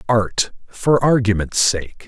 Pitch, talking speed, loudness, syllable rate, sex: 110 Hz, 115 wpm, -18 LUFS, 3.4 syllables/s, male